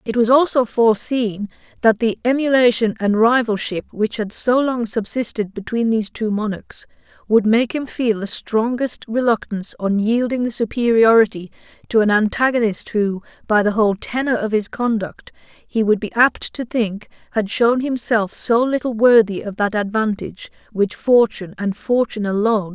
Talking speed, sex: 170 wpm, female